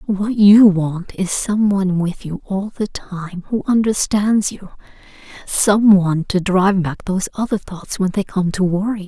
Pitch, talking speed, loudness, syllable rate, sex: 195 Hz, 185 wpm, -17 LUFS, 4.5 syllables/s, female